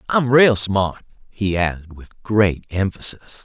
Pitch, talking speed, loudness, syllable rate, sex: 100 Hz, 140 wpm, -19 LUFS, 3.7 syllables/s, male